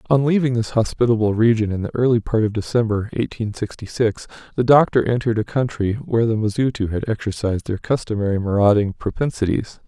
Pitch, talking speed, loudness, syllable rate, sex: 110 Hz, 170 wpm, -20 LUFS, 6.0 syllables/s, male